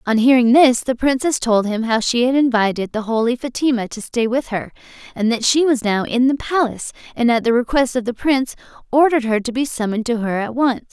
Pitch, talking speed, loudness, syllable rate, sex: 245 Hz, 230 wpm, -17 LUFS, 5.9 syllables/s, female